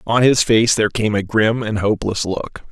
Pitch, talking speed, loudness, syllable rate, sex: 110 Hz, 220 wpm, -17 LUFS, 5.1 syllables/s, male